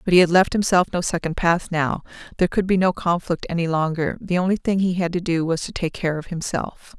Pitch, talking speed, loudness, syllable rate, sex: 175 Hz, 250 wpm, -21 LUFS, 5.8 syllables/s, female